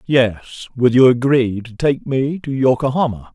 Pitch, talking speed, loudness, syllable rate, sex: 125 Hz, 160 wpm, -16 LUFS, 4.2 syllables/s, male